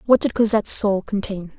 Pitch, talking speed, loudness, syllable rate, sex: 205 Hz, 190 wpm, -20 LUFS, 5.5 syllables/s, female